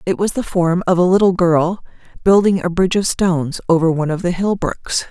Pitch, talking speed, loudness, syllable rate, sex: 180 Hz, 225 wpm, -16 LUFS, 5.6 syllables/s, female